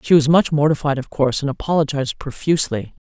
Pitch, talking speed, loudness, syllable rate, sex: 145 Hz, 175 wpm, -19 LUFS, 6.6 syllables/s, female